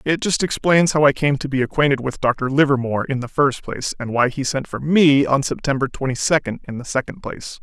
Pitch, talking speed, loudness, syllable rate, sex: 135 Hz, 235 wpm, -19 LUFS, 5.8 syllables/s, male